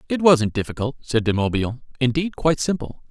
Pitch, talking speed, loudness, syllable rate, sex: 130 Hz, 175 wpm, -21 LUFS, 6.0 syllables/s, male